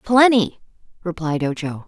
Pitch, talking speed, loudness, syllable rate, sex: 185 Hz, 95 wpm, -19 LUFS, 4.4 syllables/s, female